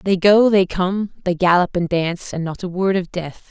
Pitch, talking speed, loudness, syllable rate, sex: 180 Hz, 240 wpm, -18 LUFS, 4.8 syllables/s, female